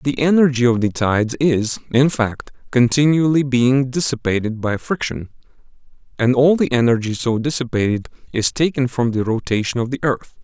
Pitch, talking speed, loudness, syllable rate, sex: 125 Hz, 155 wpm, -18 LUFS, 5.1 syllables/s, male